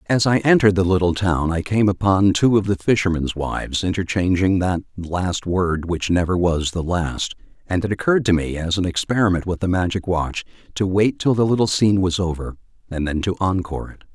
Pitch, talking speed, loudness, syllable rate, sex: 95 Hz, 205 wpm, -20 LUFS, 5.5 syllables/s, male